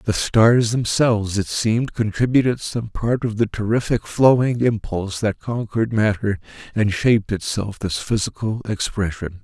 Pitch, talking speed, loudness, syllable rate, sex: 110 Hz, 140 wpm, -20 LUFS, 4.7 syllables/s, male